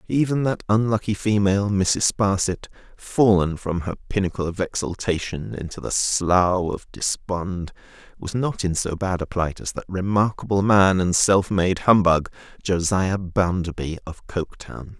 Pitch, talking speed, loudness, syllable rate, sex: 95 Hz, 145 wpm, -22 LUFS, 4.4 syllables/s, male